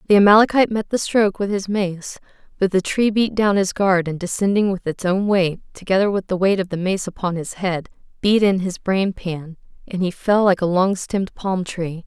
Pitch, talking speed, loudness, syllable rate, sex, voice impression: 190 Hz, 225 wpm, -19 LUFS, 5.2 syllables/s, female, very feminine, adult-like, thin, relaxed, slightly weak, bright, soft, clear, fluent, cute, intellectual, very refreshing, sincere, calm, mature, friendly, reassuring, unique, very elegant, slightly wild